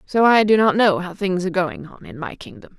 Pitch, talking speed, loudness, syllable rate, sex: 190 Hz, 280 wpm, -18 LUFS, 5.6 syllables/s, female